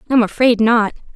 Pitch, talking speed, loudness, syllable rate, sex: 230 Hz, 155 wpm, -15 LUFS, 5.3 syllables/s, female